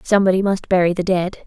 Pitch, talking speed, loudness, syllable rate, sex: 185 Hz, 205 wpm, -18 LUFS, 6.9 syllables/s, female